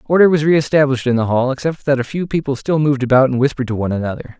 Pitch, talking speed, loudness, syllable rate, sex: 135 Hz, 260 wpm, -16 LUFS, 7.7 syllables/s, male